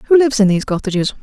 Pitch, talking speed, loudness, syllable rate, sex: 225 Hz, 245 wpm, -15 LUFS, 7.9 syllables/s, female